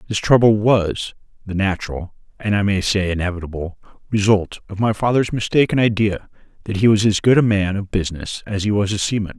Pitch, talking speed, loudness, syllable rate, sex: 100 Hz, 180 wpm, -18 LUFS, 5.7 syllables/s, male